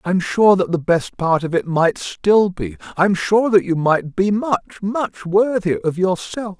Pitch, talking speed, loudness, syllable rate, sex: 190 Hz, 220 wpm, -18 LUFS, 4.3 syllables/s, male